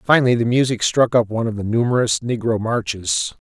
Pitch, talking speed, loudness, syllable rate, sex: 115 Hz, 190 wpm, -19 LUFS, 5.9 syllables/s, male